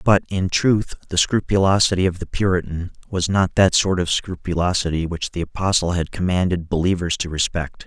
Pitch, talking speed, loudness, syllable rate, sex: 90 Hz, 170 wpm, -20 LUFS, 5.3 syllables/s, male